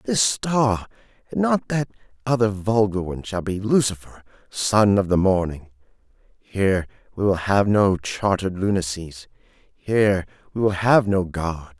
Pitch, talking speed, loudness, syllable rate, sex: 100 Hz, 140 wpm, -21 LUFS, 4.4 syllables/s, male